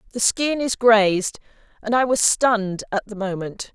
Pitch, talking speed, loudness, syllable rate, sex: 220 Hz, 175 wpm, -20 LUFS, 4.7 syllables/s, female